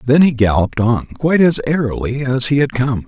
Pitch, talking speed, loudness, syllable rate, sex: 130 Hz, 215 wpm, -15 LUFS, 5.6 syllables/s, male